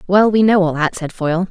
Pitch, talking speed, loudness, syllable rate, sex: 180 Hz, 280 wpm, -15 LUFS, 5.9 syllables/s, female